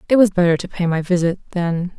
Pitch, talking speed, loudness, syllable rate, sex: 180 Hz, 240 wpm, -18 LUFS, 6.1 syllables/s, female